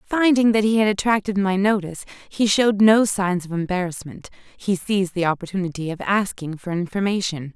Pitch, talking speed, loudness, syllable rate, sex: 195 Hz, 160 wpm, -20 LUFS, 5.5 syllables/s, female